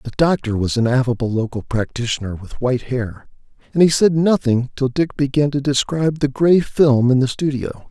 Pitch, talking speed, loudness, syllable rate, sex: 130 Hz, 190 wpm, -18 LUFS, 5.2 syllables/s, male